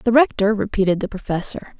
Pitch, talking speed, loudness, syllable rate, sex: 210 Hz, 165 wpm, -20 LUFS, 5.8 syllables/s, female